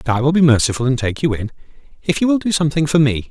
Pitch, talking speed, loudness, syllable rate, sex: 140 Hz, 290 wpm, -16 LUFS, 7.4 syllables/s, male